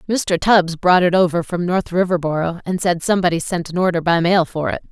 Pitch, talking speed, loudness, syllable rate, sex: 175 Hz, 220 wpm, -17 LUFS, 5.6 syllables/s, female